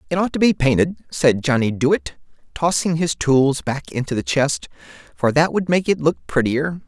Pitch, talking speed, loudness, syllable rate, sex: 145 Hz, 190 wpm, -19 LUFS, 4.7 syllables/s, male